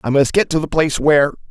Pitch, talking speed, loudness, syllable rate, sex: 150 Hz, 280 wpm, -16 LUFS, 7.0 syllables/s, male